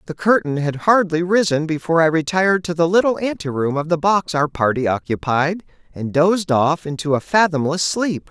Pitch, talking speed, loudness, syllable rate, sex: 165 Hz, 190 wpm, -18 LUFS, 5.3 syllables/s, male